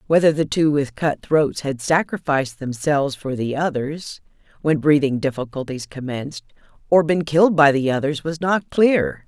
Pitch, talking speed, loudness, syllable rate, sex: 150 Hz, 160 wpm, -20 LUFS, 4.9 syllables/s, female